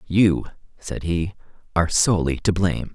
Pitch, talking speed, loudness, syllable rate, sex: 90 Hz, 145 wpm, -22 LUFS, 5.1 syllables/s, male